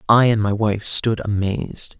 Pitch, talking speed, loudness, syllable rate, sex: 105 Hz, 180 wpm, -19 LUFS, 4.4 syllables/s, male